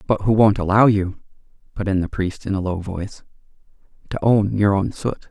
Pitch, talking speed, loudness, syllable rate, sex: 100 Hz, 205 wpm, -19 LUFS, 5.3 syllables/s, male